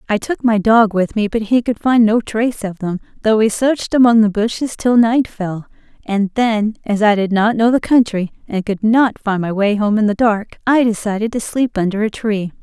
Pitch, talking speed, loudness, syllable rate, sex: 215 Hz, 235 wpm, -16 LUFS, 5.1 syllables/s, female